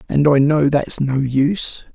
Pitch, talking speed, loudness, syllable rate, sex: 145 Hz, 185 wpm, -16 LUFS, 4.1 syllables/s, male